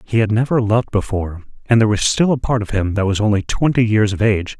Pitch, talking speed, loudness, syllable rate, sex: 110 Hz, 260 wpm, -17 LUFS, 6.6 syllables/s, male